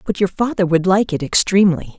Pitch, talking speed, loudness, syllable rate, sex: 185 Hz, 210 wpm, -16 LUFS, 5.8 syllables/s, female